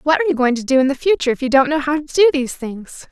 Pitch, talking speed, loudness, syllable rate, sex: 280 Hz, 345 wpm, -16 LUFS, 7.4 syllables/s, female